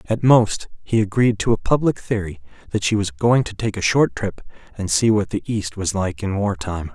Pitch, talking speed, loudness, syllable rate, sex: 105 Hz, 225 wpm, -20 LUFS, 5.1 syllables/s, male